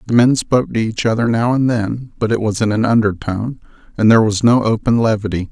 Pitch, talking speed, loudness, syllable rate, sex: 115 Hz, 240 wpm, -16 LUFS, 5.9 syllables/s, male